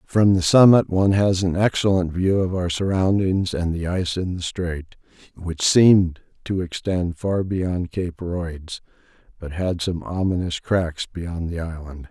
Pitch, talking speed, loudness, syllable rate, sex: 90 Hz, 165 wpm, -21 LUFS, 4.3 syllables/s, male